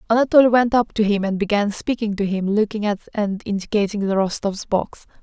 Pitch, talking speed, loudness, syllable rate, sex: 210 Hz, 195 wpm, -20 LUFS, 5.7 syllables/s, female